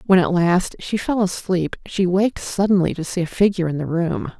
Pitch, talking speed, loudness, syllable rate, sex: 180 Hz, 220 wpm, -20 LUFS, 5.4 syllables/s, female